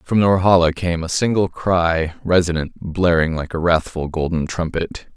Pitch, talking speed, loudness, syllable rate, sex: 85 Hz, 140 wpm, -19 LUFS, 4.5 syllables/s, male